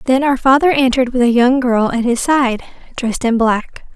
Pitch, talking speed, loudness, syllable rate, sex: 250 Hz, 210 wpm, -14 LUFS, 5.4 syllables/s, female